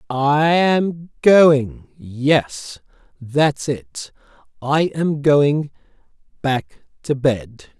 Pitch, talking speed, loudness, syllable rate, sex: 140 Hz, 85 wpm, -17 LUFS, 2.2 syllables/s, male